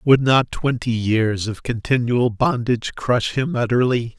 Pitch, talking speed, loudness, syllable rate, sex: 120 Hz, 145 wpm, -20 LUFS, 4.1 syllables/s, male